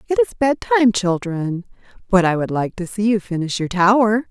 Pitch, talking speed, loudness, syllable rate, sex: 205 Hz, 210 wpm, -18 LUFS, 5.3 syllables/s, female